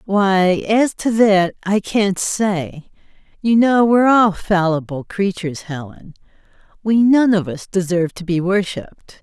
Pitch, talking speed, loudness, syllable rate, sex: 195 Hz, 145 wpm, -17 LUFS, 4.1 syllables/s, female